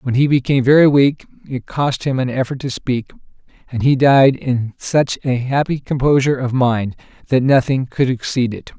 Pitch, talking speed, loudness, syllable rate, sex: 130 Hz, 185 wpm, -16 LUFS, 5.0 syllables/s, male